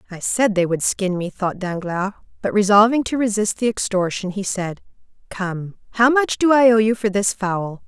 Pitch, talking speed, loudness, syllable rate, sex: 205 Hz, 200 wpm, -19 LUFS, 4.8 syllables/s, female